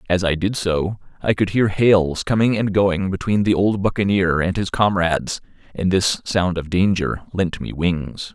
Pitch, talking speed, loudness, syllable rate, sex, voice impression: 95 Hz, 185 wpm, -19 LUFS, 4.4 syllables/s, male, masculine, adult-like, slightly thick, cool, intellectual